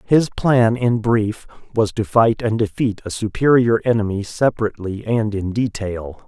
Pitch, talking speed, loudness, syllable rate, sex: 110 Hz, 155 wpm, -19 LUFS, 4.5 syllables/s, male